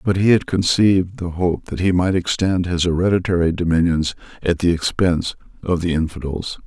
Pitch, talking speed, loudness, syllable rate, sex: 90 Hz, 170 wpm, -19 LUFS, 5.3 syllables/s, male